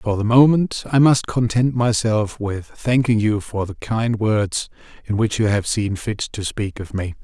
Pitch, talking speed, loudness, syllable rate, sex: 110 Hz, 200 wpm, -19 LUFS, 4.2 syllables/s, male